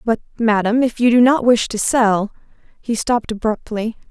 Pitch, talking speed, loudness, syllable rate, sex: 225 Hz, 175 wpm, -17 LUFS, 5.0 syllables/s, female